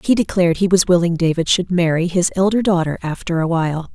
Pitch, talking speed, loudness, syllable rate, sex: 175 Hz, 215 wpm, -17 LUFS, 6.1 syllables/s, female